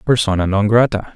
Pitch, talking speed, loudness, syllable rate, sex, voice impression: 105 Hz, 155 wpm, -15 LUFS, 5.8 syllables/s, male, masculine, very middle-aged, very thick, very tensed, very powerful, bright, very hard, soft, very clear, fluent, very cool, intellectual, slightly refreshing, sincere, very calm, very mature, very friendly, very reassuring, very unique, elegant, very wild, sweet, lively, kind, slightly modest